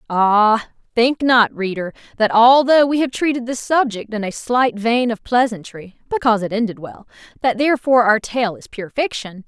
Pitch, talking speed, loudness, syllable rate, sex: 230 Hz, 175 wpm, -17 LUFS, 5.0 syllables/s, female